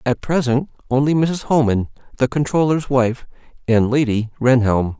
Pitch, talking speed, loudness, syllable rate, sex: 130 Hz, 130 wpm, -18 LUFS, 4.6 syllables/s, male